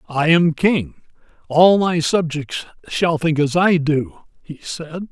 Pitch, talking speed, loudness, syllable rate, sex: 160 Hz, 150 wpm, -18 LUFS, 3.7 syllables/s, male